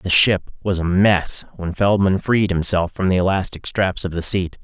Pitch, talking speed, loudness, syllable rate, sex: 95 Hz, 205 wpm, -19 LUFS, 4.6 syllables/s, male